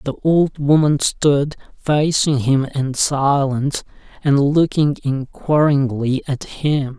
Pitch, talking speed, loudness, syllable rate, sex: 140 Hz, 110 wpm, -17 LUFS, 3.5 syllables/s, male